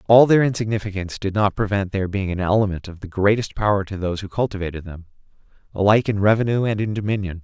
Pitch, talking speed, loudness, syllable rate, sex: 100 Hz, 200 wpm, -20 LUFS, 6.9 syllables/s, male